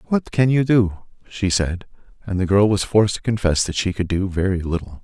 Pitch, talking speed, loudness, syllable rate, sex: 100 Hz, 225 wpm, -20 LUFS, 5.5 syllables/s, male